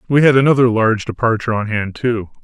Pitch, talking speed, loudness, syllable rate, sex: 115 Hz, 195 wpm, -15 LUFS, 6.5 syllables/s, male